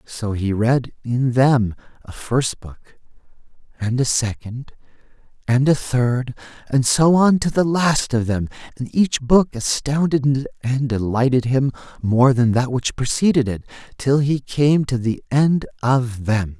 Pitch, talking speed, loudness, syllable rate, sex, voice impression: 130 Hz, 155 wpm, -19 LUFS, 3.9 syllables/s, male, masculine, adult-like, tensed, powerful, bright, soft, slightly raspy, intellectual, calm, friendly, reassuring, slightly wild, lively, kind, slightly modest